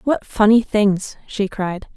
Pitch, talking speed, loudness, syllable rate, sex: 210 Hz, 155 wpm, -18 LUFS, 3.4 syllables/s, female